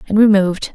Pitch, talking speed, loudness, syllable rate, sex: 200 Hz, 245 wpm, -14 LUFS, 6.8 syllables/s, female